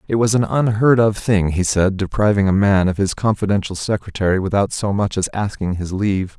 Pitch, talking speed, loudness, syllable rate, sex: 100 Hz, 205 wpm, -18 LUFS, 5.5 syllables/s, male